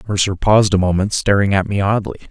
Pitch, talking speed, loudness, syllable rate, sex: 100 Hz, 210 wpm, -16 LUFS, 6.4 syllables/s, male